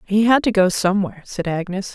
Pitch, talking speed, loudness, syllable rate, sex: 195 Hz, 215 wpm, -19 LUFS, 6.1 syllables/s, female